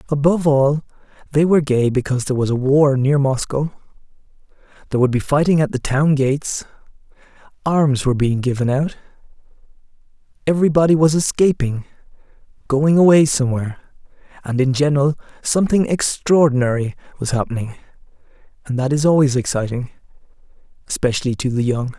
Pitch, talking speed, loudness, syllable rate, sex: 140 Hz, 125 wpm, -17 LUFS, 6.1 syllables/s, male